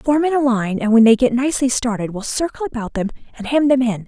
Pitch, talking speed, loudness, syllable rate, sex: 245 Hz, 250 wpm, -17 LUFS, 5.9 syllables/s, female